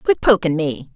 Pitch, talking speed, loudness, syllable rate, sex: 185 Hz, 190 wpm, -17 LUFS, 4.8 syllables/s, female